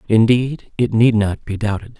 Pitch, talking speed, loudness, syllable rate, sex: 110 Hz, 180 wpm, -17 LUFS, 4.6 syllables/s, male